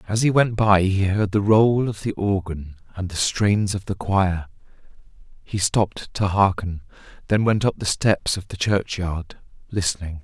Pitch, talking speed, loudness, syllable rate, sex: 95 Hz, 175 wpm, -21 LUFS, 4.4 syllables/s, male